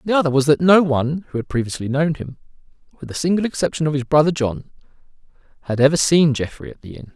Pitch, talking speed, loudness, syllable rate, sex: 150 Hz, 220 wpm, -18 LUFS, 6.6 syllables/s, male